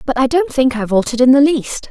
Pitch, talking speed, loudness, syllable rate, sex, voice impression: 260 Hz, 285 wpm, -14 LUFS, 6.6 syllables/s, female, feminine, slightly young, powerful, bright, soft, slightly clear, raspy, slightly cute, slightly intellectual, calm, friendly, kind, modest